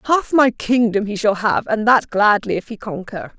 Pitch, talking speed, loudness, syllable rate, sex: 215 Hz, 215 wpm, -17 LUFS, 4.7 syllables/s, female